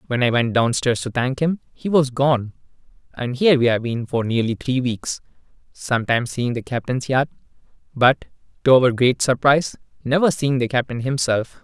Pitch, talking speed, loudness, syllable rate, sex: 130 Hz, 170 wpm, -20 LUFS, 5.2 syllables/s, male